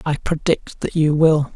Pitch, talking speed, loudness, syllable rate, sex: 150 Hz, 190 wpm, -18 LUFS, 4.1 syllables/s, male